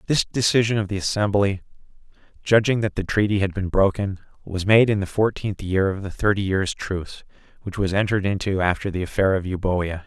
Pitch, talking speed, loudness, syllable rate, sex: 100 Hz, 190 wpm, -22 LUFS, 5.7 syllables/s, male